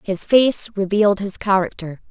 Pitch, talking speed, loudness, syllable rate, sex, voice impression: 200 Hz, 145 wpm, -18 LUFS, 4.8 syllables/s, female, feminine, very gender-neutral, young, slightly thin, slightly tensed, slightly weak, bright, hard, clear, fluent, slightly cool, very intellectual, slightly refreshing, sincere, very calm, slightly friendly, slightly reassuring, unique, elegant, slightly sweet, strict, slightly intense, sharp